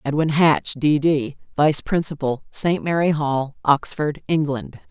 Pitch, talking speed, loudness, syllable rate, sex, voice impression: 150 Hz, 135 wpm, -20 LUFS, 3.9 syllables/s, female, very feminine, middle-aged, slightly thin, tensed, slightly powerful, slightly dark, slightly hard, clear, fluent, slightly raspy, slightly cool, intellectual, slightly refreshing, slightly sincere, calm, slightly friendly, slightly reassuring, very unique, slightly elegant, wild, slightly sweet, lively, strict, slightly intense, sharp, slightly light